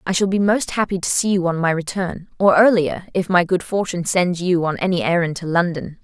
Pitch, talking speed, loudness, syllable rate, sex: 180 Hz, 230 wpm, -19 LUFS, 5.6 syllables/s, female